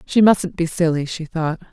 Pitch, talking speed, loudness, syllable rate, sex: 165 Hz, 210 wpm, -19 LUFS, 4.6 syllables/s, female